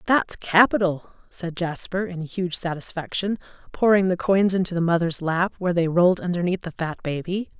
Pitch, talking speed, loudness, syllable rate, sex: 180 Hz, 165 wpm, -23 LUFS, 5.2 syllables/s, female